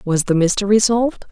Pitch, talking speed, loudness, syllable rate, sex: 205 Hz, 180 wpm, -16 LUFS, 5.9 syllables/s, female